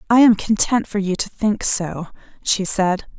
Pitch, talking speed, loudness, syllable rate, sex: 200 Hz, 190 wpm, -18 LUFS, 4.3 syllables/s, female